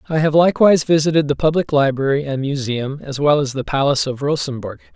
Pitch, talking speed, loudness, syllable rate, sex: 145 Hz, 195 wpm, -17 LUFS, 6.3 syllables/s, male